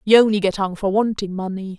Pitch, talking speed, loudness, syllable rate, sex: 200 Hz, 235 wpm, -19 LUFS, 6.0 syllables/s, female